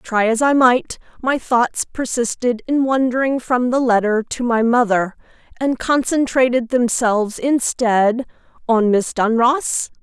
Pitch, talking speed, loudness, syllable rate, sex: 245 Hz, 125 wpm, -17 LUFS, 4.1 syllables/s, female